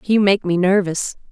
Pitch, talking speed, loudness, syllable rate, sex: 190 Hz, 185 wpm, -17 LUFS, 4.6 syllables/s, female